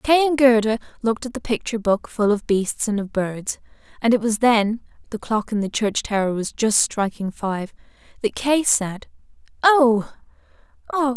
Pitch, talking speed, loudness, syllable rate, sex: 225 Hz, 160 wpm, -21 LUFS, 4.6 syllables/s, female